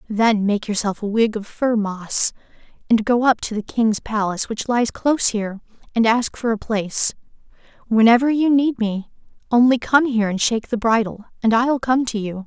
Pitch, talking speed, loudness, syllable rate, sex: 225 Hz, 195 wpm, -19 LUFS, 5.2 syllables/s, female